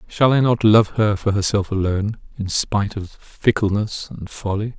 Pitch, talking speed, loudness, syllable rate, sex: 105 Hz, 175 wpm, -19 LUFS, 4.8 syllables/s, male